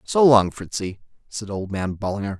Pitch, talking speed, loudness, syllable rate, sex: 105 Hz, 175 wpm, -22 LUFS, 5.0 syllables/s, male